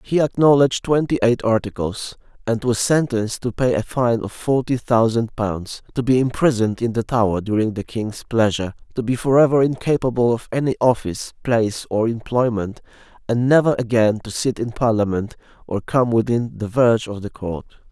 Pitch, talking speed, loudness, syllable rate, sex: 115 Hz, 170 wpm, -19 LUFS, 5.4 syllables/s, male